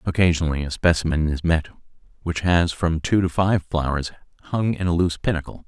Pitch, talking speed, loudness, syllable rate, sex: 85 Hz, 180 wpm, -22 LUFS, 5.8 syllables/s, male